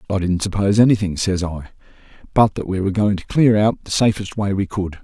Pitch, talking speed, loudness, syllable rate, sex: 100 Hz, 225 wpm, -18 LUFS, 6.1 syllables/s, male